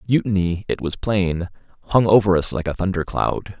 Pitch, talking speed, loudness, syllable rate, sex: 95 Hz, 185 wpm, -20 LUFS, 5.1 syllables/s, male